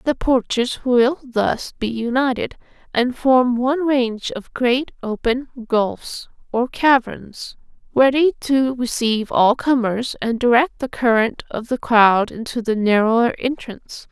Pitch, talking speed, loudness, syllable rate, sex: 245 Hz, 135 wpm, -19 LUFS, 4.0 syllables/s, female